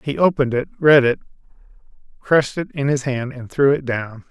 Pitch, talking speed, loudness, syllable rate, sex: 135 Hz, 195 wpm, -19 LUFS, 5.5 syllables/s, male